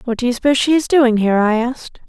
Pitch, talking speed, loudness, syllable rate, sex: 245 Hz, 290 wpm, -15 LUFS, 7.3 syllables/s, female